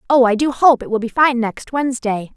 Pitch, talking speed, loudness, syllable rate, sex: 245 Hz, 255 wpm, -16 LUFS, 5.6 syllables/s, female